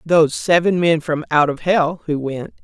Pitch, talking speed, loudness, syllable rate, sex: 160 Hz, 205 wpm, -17 LUFS, 4.7 syllables/s, female